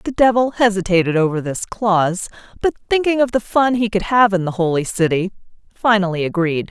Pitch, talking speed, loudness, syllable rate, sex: 200 Hz, 180 wpm, -17 LUFS, 5.6 syllables/s, female